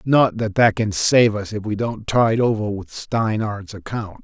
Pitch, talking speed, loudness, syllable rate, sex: 105 Hz, 200 wpm, -20 LUFS, 4.2 syllables/s, male